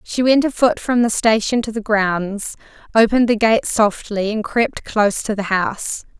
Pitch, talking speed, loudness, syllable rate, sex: 220 Hz, 185 wpm, -17 LUFS, 4.7 syllables/s, female